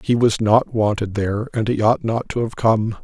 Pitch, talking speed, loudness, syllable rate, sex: 110 Hz, 235 wpm, -19 LUFS, 4.9 syllables/s, male